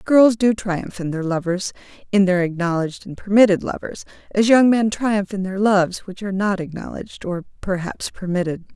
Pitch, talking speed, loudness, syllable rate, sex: 195 Hz, 170 wpm, -20 LUFS, 5.3 syllables/s, female